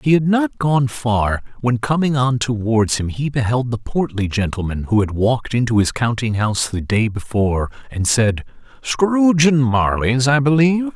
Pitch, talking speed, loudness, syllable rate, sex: 125 Hz, 175 wpm, -18 LUFS, 4.8 syllables/s, male